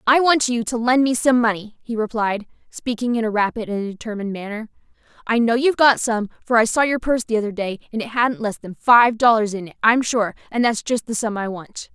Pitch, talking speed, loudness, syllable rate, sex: 225 Hz, 240 wpm, -19 LUFS, 5.7 syllables/s, female